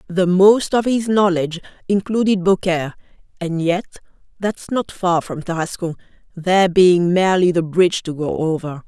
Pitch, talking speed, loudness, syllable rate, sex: 180 Hz, 150 wpm, -18 LUFS, 5.0 syllables/s, female